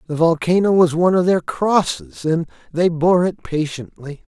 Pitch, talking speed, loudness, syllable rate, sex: 165 Hz, 165 wpm, -18 LUFS, 4.7 syllables/s, male